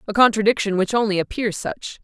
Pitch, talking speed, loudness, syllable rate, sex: 210 Hz, 175 wpm, -20 LUFS, 5.9 syllables/s, female